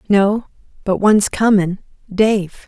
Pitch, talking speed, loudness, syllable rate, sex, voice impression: 200 Hz, 90 wpm, -16 LUFS, 6.2 syllables/s, female, feminine, adult-like, tensed, bright, fluent, slightly raspy, intellectual, elegant, lively, slightly strict, sharp